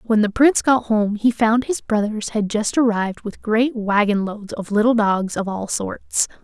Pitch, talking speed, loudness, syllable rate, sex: 220 Hz, 205 wpm, -19 LUFS, 4.5 syllables/s, female